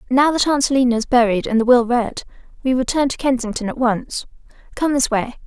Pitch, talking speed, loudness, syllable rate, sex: 250 Hz, 210 wpm, -18 LUFS, 5.8 syllables/s, female